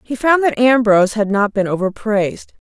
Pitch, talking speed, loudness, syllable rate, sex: 220 Hz, 180 wpm, -15 LUFS, 5.3 syllables/s, female